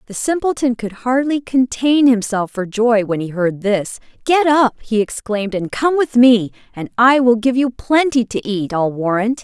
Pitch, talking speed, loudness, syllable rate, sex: 235 Hz, 190 wpm, -16 LUFS, 4.5 syllables/s, female